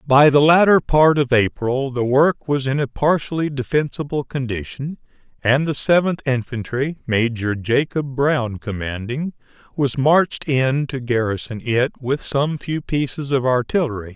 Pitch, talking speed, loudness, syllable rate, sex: 135 Hz, 145 wpm, -19 LUFS, 4.4 syllables/s, male